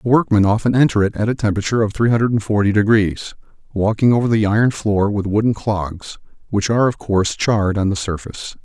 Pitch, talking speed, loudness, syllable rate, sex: 105 Hz, 200 wpm, -17 LUFS, 6.2 syllables/s, male